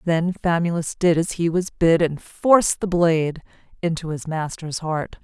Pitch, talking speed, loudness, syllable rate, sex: 170 Hz, 170 wpm, -21 LUFS, 4.5 syllables/s, female